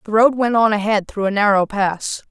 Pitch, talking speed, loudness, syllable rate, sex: 210 Hz, 235 wpm, -17 LUFS, 5.2 syllables/s, female